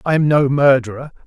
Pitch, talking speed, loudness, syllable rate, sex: 140 Hz, 190 wpm, -14 LUFS, 5.7 syllables/s, male